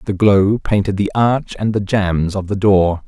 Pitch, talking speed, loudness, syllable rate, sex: 100 Hz, 215 wpm, -16 LUFS, 4.2 syllables/s, male